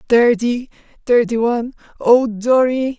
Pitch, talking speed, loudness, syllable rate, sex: 240 Hz, 80 wpm, -16 LUFS, 4.1 syllables/s, male